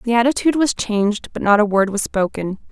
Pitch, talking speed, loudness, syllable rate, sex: 220 Hz, 220 wpm, -18 LUFS, 5.9 syllables/s, female